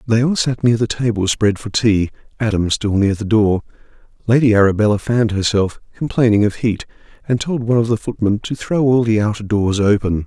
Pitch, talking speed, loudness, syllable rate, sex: 110 Hz, 200 wpm, -17 LUFS, 5.6 syllables/s, male